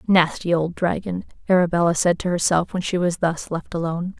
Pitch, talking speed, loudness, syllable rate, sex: 175 Hz, 185 wpm, -21 LUFS, 5.5 syllables/s, female